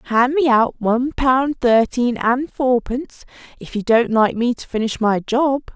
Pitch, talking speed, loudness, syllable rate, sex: 245 Hz, 175 wpm, -18 LUFS, 4.3 syllables/s, female